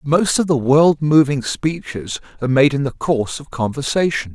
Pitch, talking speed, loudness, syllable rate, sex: 140 Hz, 180 wpm, -17 LUFS, 4.9 syllables/s, male